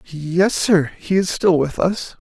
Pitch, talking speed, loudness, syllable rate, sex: 175 Hz, 185 wpm, -18 LUFS, 3.4 syllables/s, male